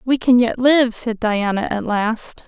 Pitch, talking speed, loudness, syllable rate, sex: 230 Hz, 195 wpm, -17 LUFS, 3.9 syllables/s, female